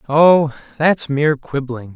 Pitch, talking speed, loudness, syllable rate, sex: 145 Hz, 125 wpm, -16 LUFS, 4.0 syllables/s, male